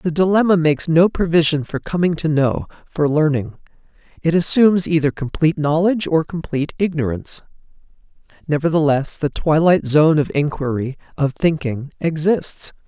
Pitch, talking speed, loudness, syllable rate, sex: 155 Hz, 130 wpm, -18 LUFS, 5.2 syllables/s, male